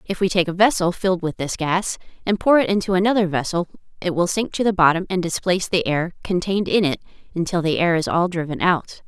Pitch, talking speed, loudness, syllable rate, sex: 180 Hz, 230 wpm, -20 LUFS, 6.1 syllables/s, female